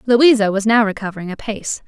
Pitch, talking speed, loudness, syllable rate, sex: 215 Hz, 160 wpm, -17 LUFS, 6.4 syllables/s, female